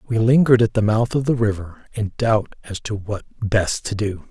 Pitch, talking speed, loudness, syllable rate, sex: 110 Hz, 225 wpm, -20 LUFS, 5.3 syllables/s, male